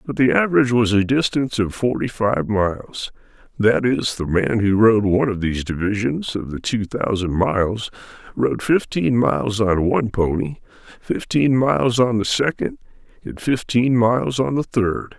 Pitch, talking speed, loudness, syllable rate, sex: 110 Hz, 165 wpm, -19 LUFS, 4.8 syllables/s, male